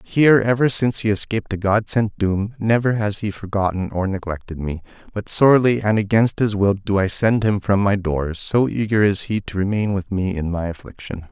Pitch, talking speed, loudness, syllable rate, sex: 105 Hz, 210 wpm, -19 LUFS, 5.3 syllables/s, male